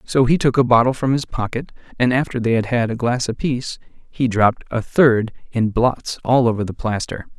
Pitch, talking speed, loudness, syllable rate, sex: 120 Hz, 210 wpm, -19 LUFS, 5.2 syllables/s, male